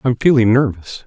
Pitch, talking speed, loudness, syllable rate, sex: 120 Hz, 170 wpm, -14 LUFS, 5.2 syllables/s, male